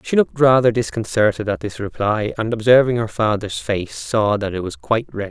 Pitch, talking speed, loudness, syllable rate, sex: 110 Hz, 205 wpm, -19 LUFS, 5.4 syllables/s, male